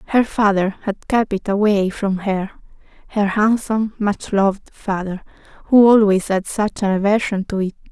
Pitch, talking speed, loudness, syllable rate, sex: 205 Hz, 150 wpm, -18 LUFS, 4.7 syllables/s, female